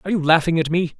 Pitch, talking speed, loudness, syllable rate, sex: 165 Hz, 305 wpm, -18 LUFS, 8.0 syllables/s, male